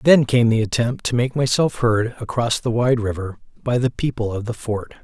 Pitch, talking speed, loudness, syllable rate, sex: 120 Hz, 215 wpm, -20 LUFS, 5.0 syllables/s, male